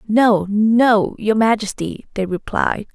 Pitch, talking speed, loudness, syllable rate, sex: 215 Hz, 120 wpm, -17 LUFS, 3.5 syllables/s, female